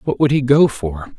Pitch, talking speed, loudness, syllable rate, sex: 125 Hz, 255 wpm, -16 LUFS, 5.0 syllables/s, male